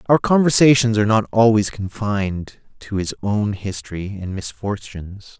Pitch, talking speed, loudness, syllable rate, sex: 105 Hz, 135 wpm, -19 LUFS, 4.8 syllables/s, male